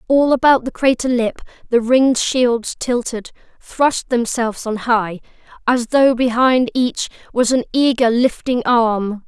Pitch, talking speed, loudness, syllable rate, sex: 245 Hz, 140 wpm, -16 LUFS, 4.1 syllables/s, female